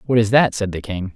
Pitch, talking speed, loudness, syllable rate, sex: 105 Hz, 310 wpm, -18 LUFS, 5.9 syllables/s, male